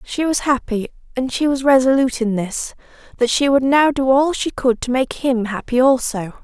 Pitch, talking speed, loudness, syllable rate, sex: 255 Hz, 195 wpm, -17 LUFS, 5.0 syllables/s, female